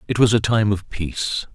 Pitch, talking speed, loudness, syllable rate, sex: 105 Hz, 235 wpm, -20 LUFS, 5.2 syllables/s, male